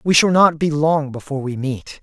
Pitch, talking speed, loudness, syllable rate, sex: 150 Hz, 235 wpm, -17 LUFS, 5.2 syllables/s, male